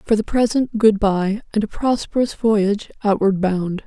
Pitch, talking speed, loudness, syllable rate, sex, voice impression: 210 Hz, 170 wpm, -19 LUFS, 4.6 syllables/s, female, feminine, slightly gender-neutral, slightly young, very adult-like, relaxed, weak, dark, slightly soft, clear, fluent, slightly cute, intellectual, sincere, very calm, slightly friendly, reassuring, slightly elegant, slightly sweet, kind, very modest